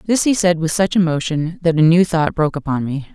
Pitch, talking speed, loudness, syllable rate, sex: 165 Hz, 250 wpm, -17 LUFS, 5.9 syllables/s, female